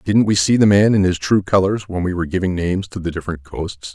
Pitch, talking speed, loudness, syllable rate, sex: 95 Hz, 275 wpm, -18 LUFS, 6.2 syllables/s, male